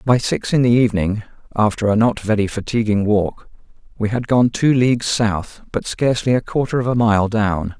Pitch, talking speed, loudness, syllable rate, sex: 110 Hz, 190 wpm, -18 LUFS, 5.2 syllables/s, male